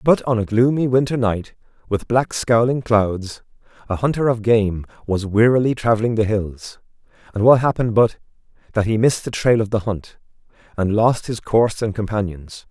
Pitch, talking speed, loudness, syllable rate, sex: 110 Hz, 175 wpm, -19 LUFS, 5.1 syllables/s, male